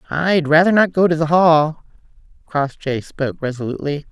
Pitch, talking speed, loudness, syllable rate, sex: 155 Hz, 145 wpm, -17 LUFS, 5.2 syllables/s, female